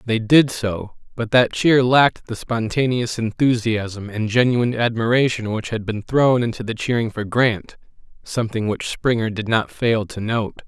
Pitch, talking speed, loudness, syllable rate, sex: 115 Hz, 170 wpm, -19 LUFS, 4.5 syllables/s, male